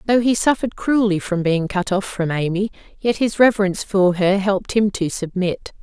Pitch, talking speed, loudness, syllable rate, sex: 200 Hz, 195 wpm, -19 LUFS, 5.2 syllables/s, female